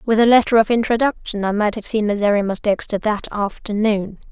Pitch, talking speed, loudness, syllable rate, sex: 215 Hz, 180 wpm, -18 LUFS, 5.7 syllables/s, female